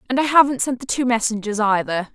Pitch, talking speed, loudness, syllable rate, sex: 235 Hz, 225 wpm, -19 LUFS, 6.1 syllables/s, female